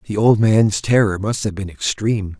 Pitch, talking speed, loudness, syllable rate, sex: 105 Hz, 200 wpm, -17 LUFS, 5.0 syllables/s, male